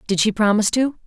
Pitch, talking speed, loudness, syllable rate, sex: 215 Hz, 225 wpm, -18 LUFS, 6.9 syllables/s, female